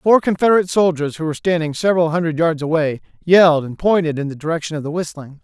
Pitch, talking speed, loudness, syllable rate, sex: 165 Hz, 210 wpm, -17 LUFS, 6.8 syllables/s, male